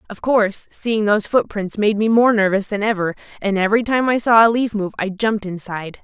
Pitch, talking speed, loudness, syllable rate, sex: 210 Hz, 220 wpm, -18 LUFS, 5.9 syllables/s, female